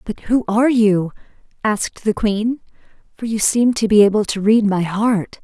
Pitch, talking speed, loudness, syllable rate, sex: 215 Hz, 190 wpm, -17 LUFS, 4.7 syllables/s, female